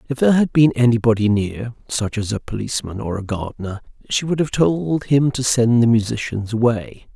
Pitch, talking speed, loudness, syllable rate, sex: 120 Hz, 195 wpm, -19 LUFS, 5.4 syllables/s, male